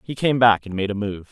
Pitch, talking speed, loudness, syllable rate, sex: 110 Hz, 320 wpm, -20 LUFS, 5.8 syllables/s, male